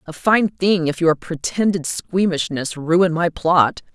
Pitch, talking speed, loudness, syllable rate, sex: 170 Hz, 150 wpm, -18 LUFS, 3.8 syllables/s, female